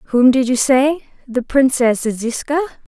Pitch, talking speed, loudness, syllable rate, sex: 260 Hz, 140 wpm, -16 LUFS, 3.7 syllables/s, female